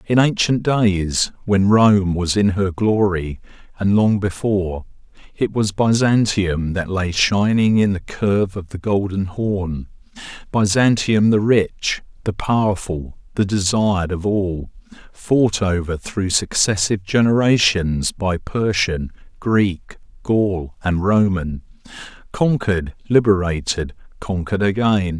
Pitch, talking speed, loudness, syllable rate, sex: 100 Hz, 115 wpm, -18 LUFS, 3.9 syllables/s, male